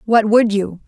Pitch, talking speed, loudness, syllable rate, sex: 210 Hz, 205 wpm, -15 LUFS, 4.3 syllables/s, female